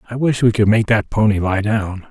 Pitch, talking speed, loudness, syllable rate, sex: 110 Hz, 255 wpm, -16 LUFS, 5.2 syllables/s, male